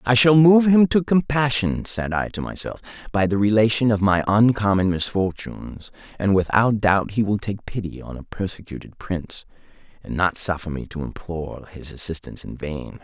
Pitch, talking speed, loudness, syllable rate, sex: 105 Hz, 175 wpm, -21 LUFS, 5.1 syllables/s, male